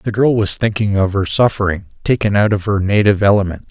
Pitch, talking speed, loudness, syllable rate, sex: 100 Hz, 210 wpm, -15 LUFS, 6.0 syllables/s, male